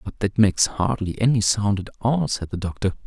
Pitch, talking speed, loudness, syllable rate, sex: 105 Hz, 215 wpm, -22 LUFS, 5.4 syllables/s, male